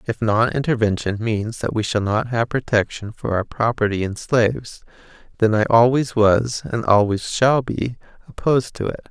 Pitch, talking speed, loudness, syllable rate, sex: 115 Hz, 170 wpm, -20 LUFS, 4.7 syllables/s, male